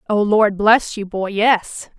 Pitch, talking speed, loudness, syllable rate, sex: 210 Hz, 180 wpm, -16 LUFS, 3.5 syllables/s, female